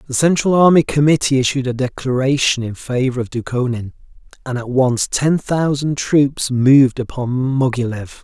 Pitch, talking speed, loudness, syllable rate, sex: 130 Hz, 145 wpm, -16 LUFS, 4.8 syllables/s, male